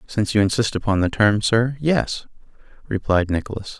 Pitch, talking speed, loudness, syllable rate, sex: 110 Hz, 160 wpm, -20 LUFS, 5.3 syllables/s, male